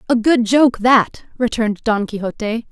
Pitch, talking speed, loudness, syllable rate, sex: 230 Hz, 155 wpm, -16 LUFS, 4.6 syllables/s, female